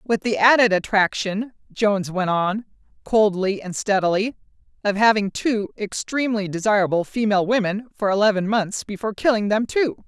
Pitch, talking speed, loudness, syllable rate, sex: 210 Hz, 145 wpm, -21 LUFS, 5.2 syllables/s, female